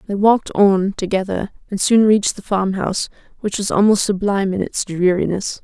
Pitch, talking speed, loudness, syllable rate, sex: 200 Hz, 170 wpm, -17 LUFS, 5.4 syllables/s, female